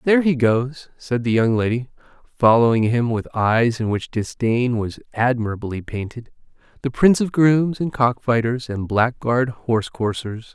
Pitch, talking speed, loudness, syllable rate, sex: 120 Hz, 155 wpm, -20 LUFS, 4.6 syllables/s, male